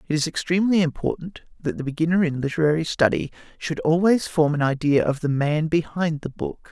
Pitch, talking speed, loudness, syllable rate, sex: 160 Hz, 190 wpm, -22 LUFS, 5.7 syllables/s, male